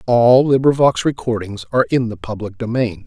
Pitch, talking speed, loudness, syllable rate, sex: 115 Hz, 155 wpm, -17 LUFS, 5.4 syllables/s, male